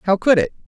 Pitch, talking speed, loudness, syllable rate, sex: 200 Hz, 230 wpm, -17 LUFS, 5.8 syllables/s, female